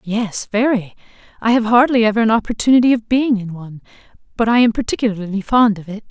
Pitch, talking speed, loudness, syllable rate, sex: 220 Hz, 185 wpm, -16 LUFS, 6.3 syllables/s, female